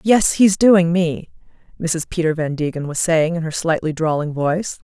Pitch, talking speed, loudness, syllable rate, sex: 165 Hz, 170 wpm, -18 LUFS, 4.8 syllables/s, female